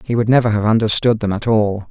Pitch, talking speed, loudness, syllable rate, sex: 110 Hz, 250 wpm, -16 LUFS, 6.1 syllables/s, male